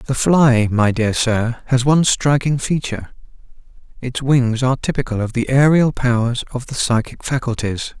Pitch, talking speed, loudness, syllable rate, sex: 125 Hz, 160 wpm, -17 LUFS, 4.8 syllables/s, male